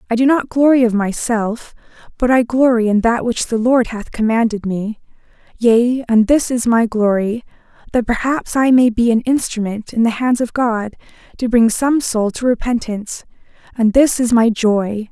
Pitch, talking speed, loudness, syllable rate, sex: 235 Hz, 185 wpm, -16 LUFS, 4.7 syllables/s, female